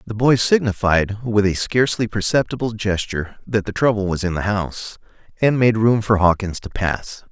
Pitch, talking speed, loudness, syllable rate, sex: 105 Hz, 180 wpm, -19 LUFS, 5.1 syllables/s, male